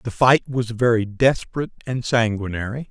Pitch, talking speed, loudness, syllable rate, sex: 120 Hz, 145 wpm, -20 LUFS, 5.2 syllables/s, male